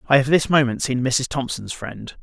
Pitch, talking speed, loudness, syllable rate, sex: 130 Hz, 215 wpm, -20 LUFS, 5.0 syllables/s, male